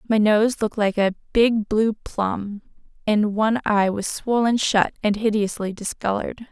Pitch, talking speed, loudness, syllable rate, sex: 215 Hz, 155 wpm, -21 LUFS, 4.5 syllables/s, female